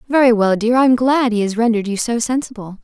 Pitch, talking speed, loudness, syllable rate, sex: 230 Hz, 255 wpm, -16 LUFS, 6.4 syllables/s, female